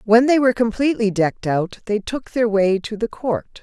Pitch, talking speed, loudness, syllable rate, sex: 220 Hz, 215 wpm, -19 LUFS, 5.2 syllables/s, female